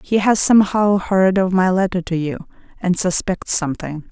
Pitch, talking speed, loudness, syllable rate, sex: 185 Hz, 175 wpm, -17 LUFS, 4.9 syllables/s, female